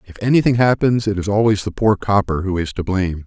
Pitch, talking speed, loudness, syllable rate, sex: 100 Hz, 240 wpm, -17 LUFS, 6.0 syllables/s, male